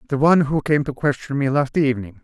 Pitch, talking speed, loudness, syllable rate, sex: 140 Hz, 240 wpm, -19 LUFS, 6.5 syllables/s, male